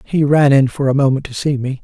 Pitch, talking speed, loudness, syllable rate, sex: 140 Hz, 295 wpm, -15 LUFS, 5.8 syllables/s, male